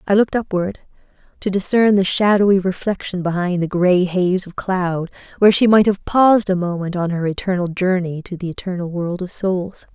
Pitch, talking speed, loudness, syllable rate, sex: 185 Hz, 185 wpm, -18 LUFS, 5.3 syllables/s, female